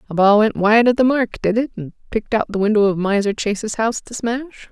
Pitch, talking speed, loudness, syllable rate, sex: 220 Hz, 255 wpm, -18 LUFS, 5.9 syllables/s, female